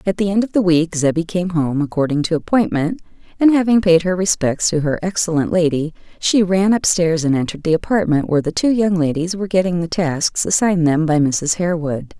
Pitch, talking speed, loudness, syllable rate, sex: 170 Hz, 210 wpm, -17 LUFS, 5.7 syllables/s, female